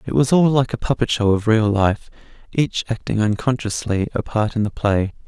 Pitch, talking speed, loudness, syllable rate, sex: 115 Hz, 195 wpm, -19 LUFS, 5.1 syllables/s, male